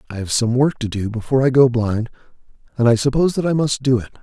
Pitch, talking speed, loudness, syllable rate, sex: 125 Hz, 255 wpm, -18 LUFS, 6.9 syllables/s, male